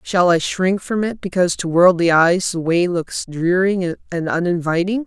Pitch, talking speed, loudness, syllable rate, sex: 180 Hz, 180 wpm, -18 LUFS, 4.6 syllables/s, female